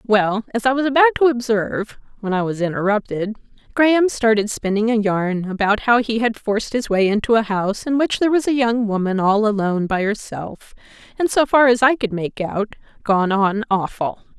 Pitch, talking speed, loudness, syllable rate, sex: 220 Hz, 190 wpm, -18 LUFS, 5.3 syllables/s, female